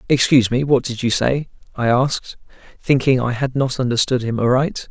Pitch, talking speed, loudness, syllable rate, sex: 125 Hz, 185 wpm, -18 LUFS, 5.4 syllables/s, male